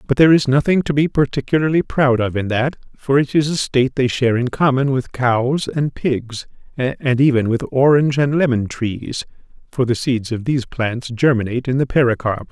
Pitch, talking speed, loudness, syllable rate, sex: 130 Hz, 195 wpm, -17 LUFS, 5.3 syllables/s, male